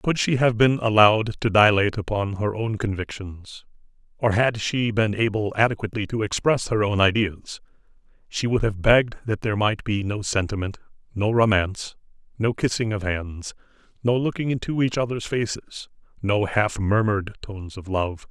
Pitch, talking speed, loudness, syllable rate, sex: 105 Hz, 160 wpm, -22 LUFS, 5.1 syllables/s, male